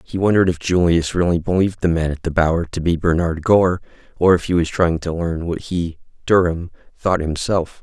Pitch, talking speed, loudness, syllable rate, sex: 85 Hz, 190 wpm, -18 LUFS, 5.4 syllables/s, male